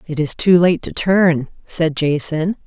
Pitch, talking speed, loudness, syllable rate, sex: 165 Hz, 180 wpm, -16 LUFS, 4.0 syllables/s, female